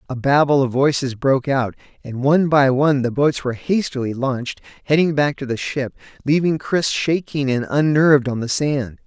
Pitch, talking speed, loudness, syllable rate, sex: 135 Hz, 185 wpm, -18 LUFS, 5.3 syllables/s, male